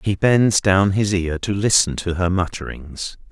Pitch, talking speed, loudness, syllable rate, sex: 95 Hz, 180 wpm, -18 LUFS, 4.2 syllables/s, male